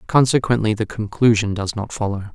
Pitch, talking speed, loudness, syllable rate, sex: 110 Hz, 155 wpm, -19 LUFS, 5.6 syllables/s, male